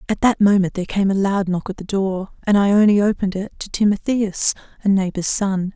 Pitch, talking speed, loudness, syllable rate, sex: 195 Hz, 210 wpm, -19 LUFS, 5.3 syllables/s, female